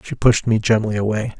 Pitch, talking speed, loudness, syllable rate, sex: 110 Hz, 215 wpm, -18 LUFS, 5.5 syllables/s, male